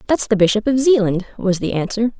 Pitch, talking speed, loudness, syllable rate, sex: 215 Hz, 220 wpm, -17 LUFS, 5.9 syllables/s, female